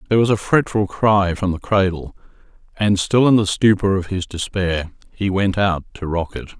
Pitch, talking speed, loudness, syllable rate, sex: 95 Hz, 200 wpm, -18 LUFS, 5.1 syllables/s, male